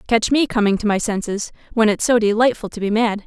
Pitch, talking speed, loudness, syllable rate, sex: 220 Hz, 240 wpm, -18 LUFS, 5.9 syllables/s, female